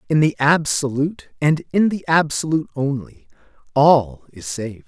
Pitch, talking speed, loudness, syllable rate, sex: 145 Hz, 135 wpm, -19 LUFS, 4.8 syllables/s, male